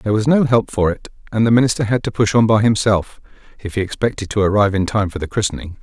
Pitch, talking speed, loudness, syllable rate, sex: 105 Hz, 260 wpm, -17 LUFS, 6.8 syllables/s, male